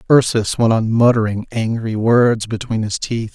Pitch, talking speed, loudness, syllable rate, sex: 115 Hz, 160 wpm, -17 LUFS, 4.5 syllables/s, male